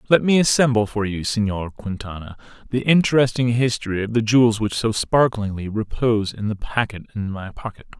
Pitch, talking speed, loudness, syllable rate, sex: 115 Hz, 175 wpm, -20 LUFS, 5.6 syllables/s, male